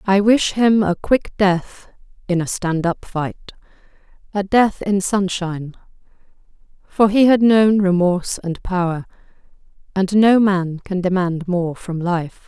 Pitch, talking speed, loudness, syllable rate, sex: 190 Hz, 140 wpm, -18 LUFS, 4.0 syllables/s, female